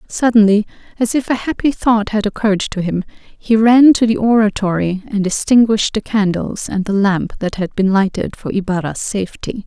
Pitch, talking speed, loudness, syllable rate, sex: 210 Hz, 180 wpm, -15 LUFS, 5.1 syllables/s, female